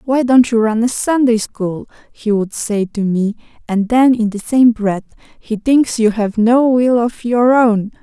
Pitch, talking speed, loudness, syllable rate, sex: 230 Hz, 200 wpm, -14 LUFS, 4.0 syllables/s, female